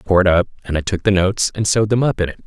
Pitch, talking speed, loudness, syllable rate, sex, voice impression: 95 Hz, 365 wpm, -17 LUFS, 8.0 syllables/s, male, masculine, middle-aged, tensed, powerful, hard, clear, fluent, cool, intellectual, reassuring, wild, lively, slightly strict